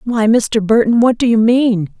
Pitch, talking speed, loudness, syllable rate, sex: 225 Hz, 210 wpm, -13 LUFS, 4.3 syllables/s, female